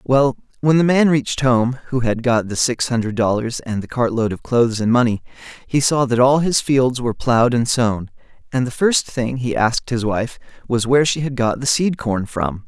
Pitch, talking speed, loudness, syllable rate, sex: 125 Hz, 225 wpm, -18 LUFS, 5.2 syllables/s, male